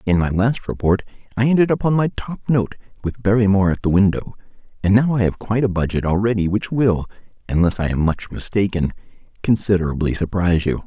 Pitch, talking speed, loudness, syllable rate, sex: 100 Hz, 180 wpm, -19 LUFS, 6.1 syllables/s, male